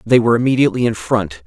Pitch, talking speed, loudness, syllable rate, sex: 120 Hz, 205 wpm, -16 LUFS, 7.4 syllables/s, male